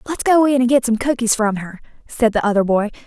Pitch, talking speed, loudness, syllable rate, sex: 235 Hz, 255 wpm, -17 LUFS, 5.9 syllables/s, female